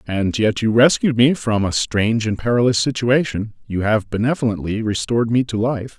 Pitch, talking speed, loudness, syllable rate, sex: 115 Hz, 180 wpm, -18 LUFS, 5.2 syllables/s, male